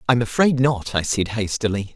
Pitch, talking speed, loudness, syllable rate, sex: 115 Hz, 185 wpm, -20 LUFS, 5.1 syllables/s, male